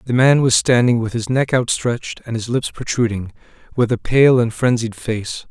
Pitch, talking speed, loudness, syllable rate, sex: 120 Hz, 195 wpm, -17 LUFS, 4.9 syllables/s, male